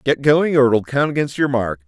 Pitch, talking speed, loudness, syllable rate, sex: 135 Hz, 255 wpm, -17 LUFS, 5.2 syllables/s, male